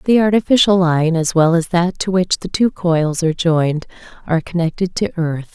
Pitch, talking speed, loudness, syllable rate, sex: 175 Hz, 195 wpm, -16 LUFS, 5.1 syllables/s, female